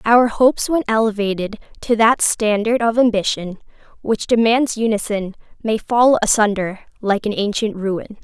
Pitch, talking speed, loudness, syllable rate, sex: 220 Hz, 140 wpm, -17 LUFS, 4.7 syllables/s, female